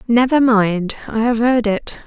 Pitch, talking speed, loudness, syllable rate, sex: 230 Hz, 175 wpm, -16 LUFS, 4.1 syllables/s, female